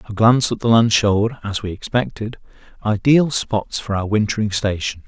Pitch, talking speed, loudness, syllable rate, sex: 110 Hz, 175 wpm, -18 LUFS, 5.2 syllables/s, male